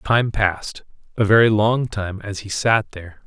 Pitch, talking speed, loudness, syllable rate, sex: 105 Hz, 185 wpm, -19 LUFS, 4.5 syllables/s, male